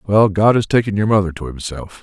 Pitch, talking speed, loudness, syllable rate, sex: 100 Hz, 235 wpm, -16 LUFS, 5.8 syllables/s, male